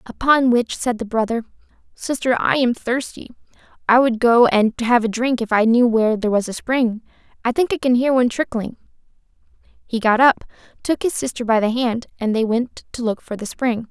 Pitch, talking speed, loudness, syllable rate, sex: 240 Hz, 205 wpm, -19 LUFS, 5.4 syllables/s, female